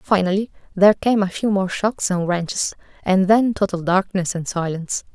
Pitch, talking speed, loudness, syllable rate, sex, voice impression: 190 Hz, 175 wpm, -20 LUFS, 5.1 syllables/s, female, slightly gender-neutral, slightly young, slightly weak, slightly clear, slightly halting, friendly, unique, kind, modest